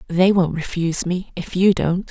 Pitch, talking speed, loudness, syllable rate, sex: 180 Hz, 200 wpm, -19 LUFS, 4.8 syllables/s, female